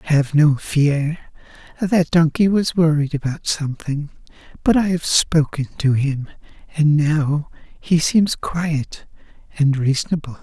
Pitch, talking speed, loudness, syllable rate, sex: 155 Hz, 125 wpm, -19 LUFS, 3.9 syllables/s, male